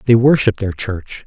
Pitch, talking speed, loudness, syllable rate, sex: 110 Hz, 190 wpm, -16 LUFS, 4.5 syllables/s, male